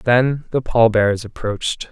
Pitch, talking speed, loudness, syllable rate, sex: 115 Hz, 125 wpm, -18 LUFS, 4.4 syllables/s, male